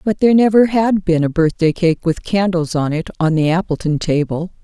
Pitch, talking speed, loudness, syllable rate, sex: 175 Hz, 205 wpm, -16 LUFS, 5.3 syllables/s, female